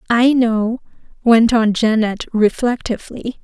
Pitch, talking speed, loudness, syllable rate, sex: 230 Hz, 105 wpm, -16 LUFS, 4.0 syllables/s, female